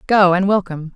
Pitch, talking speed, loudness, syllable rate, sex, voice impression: 185 Hz, 190 wpm, -15 LUFS, 6.2 syllables/s, female, feminine, adult-like, tensed, dark, clear, halting, intellectual, calm, modest